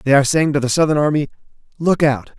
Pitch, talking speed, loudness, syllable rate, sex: 145 Hz, 225 wpm, -16 LUFS, 6.9 syllables/s, male